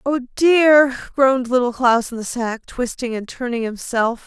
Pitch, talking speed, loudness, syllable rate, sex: 250 Hz, 170 wpm, -18 LUFS, 4.4 syllables/s, female